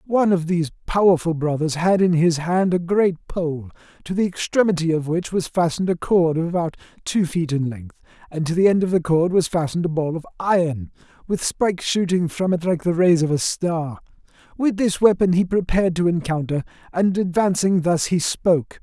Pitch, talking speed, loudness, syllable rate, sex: 170 Hz, 200 wpm, -20 LUFS, 5.3 syllables/s, male